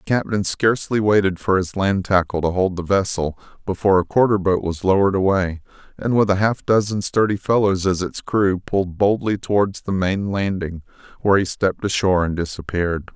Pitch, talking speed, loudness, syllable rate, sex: 95 Hz, 185 wpm, -20 LUFS, 5.6 syllables/s, male